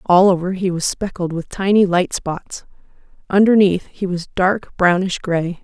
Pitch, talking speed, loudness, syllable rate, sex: 185 Hz, 160 wpm, -17 LUFS, 4.4 syllables/s, female